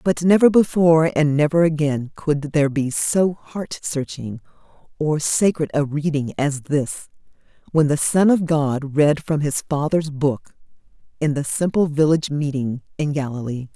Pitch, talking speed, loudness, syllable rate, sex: 150 Hz, 155 wpm, -20 LUFS, 4.5 syllables/s, female